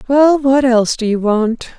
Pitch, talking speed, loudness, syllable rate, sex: 250 Hz, 200 wpm, -13 LUFS, 4.6 syllables/s, female